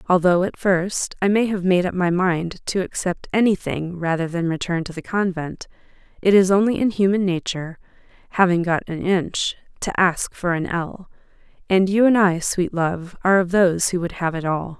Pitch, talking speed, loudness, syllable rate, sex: 180 Hz, 195 wpm, -20 LUFS, 5.0 syllables/s, female